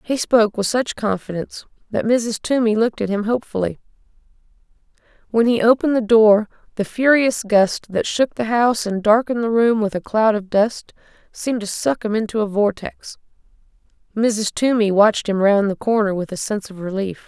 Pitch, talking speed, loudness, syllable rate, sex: 215 Hz, 180 wpm, -18 LUFS, 5.5 syllables/s, female